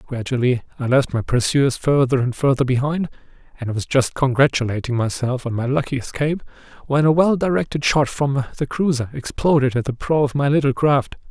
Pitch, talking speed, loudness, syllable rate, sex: 135 Hz, 185 wpm, -19 LUFS, 5.6 syllables/s, male